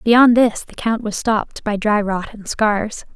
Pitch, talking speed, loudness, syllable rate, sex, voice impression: 215 Hz, 210 wpm, -18 LUFS, 4.1 syllables/s, female, feminine, slightly young, bright, clear, fluent, cute, calm, friendly, slightly sweet, kind